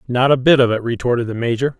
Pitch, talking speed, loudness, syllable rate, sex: 125 Hz, 270 wpm, -16 LUFS, 6.8 syllables/s, male